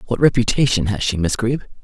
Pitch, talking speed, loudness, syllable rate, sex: 110 Hz, 195 wpm, -18 LUFS, 6.0 syllables/s, male